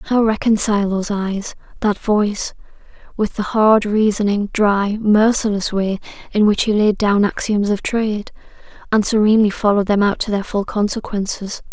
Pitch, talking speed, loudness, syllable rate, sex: 210 Hz, 155 wpm, -17 LUFS, 5.0 syllables/s, female